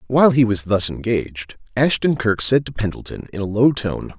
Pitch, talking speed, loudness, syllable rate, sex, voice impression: 110 Hz, 200 wpm, -18 LUFS, 5.3 syllables/s, male, very masculine, very adult-like, middle-aged, very thick, very tensed, very powerful, bright, soft, slightly muffled, fluent, raspy, very cool, very intellectual, slightly refreshing, very sincere, very calm, very mature, friendly, reassuring, slightly unique, slightly elegant, wild, sweet, lively, very kind